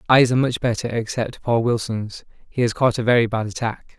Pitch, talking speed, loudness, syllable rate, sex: 115 Hz, 210 wpm, -21 LUFS, 5.6 syllables/s, male